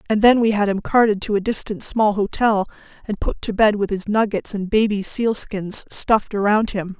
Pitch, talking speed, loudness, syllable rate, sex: 205 Hz, 215 wpm, -19 LUFS, 5.1 syllables/s, female